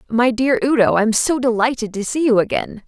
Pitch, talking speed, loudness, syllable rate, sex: 245 Hz, 210 wpm, -17 LUFS, 5.3 syllables/s, female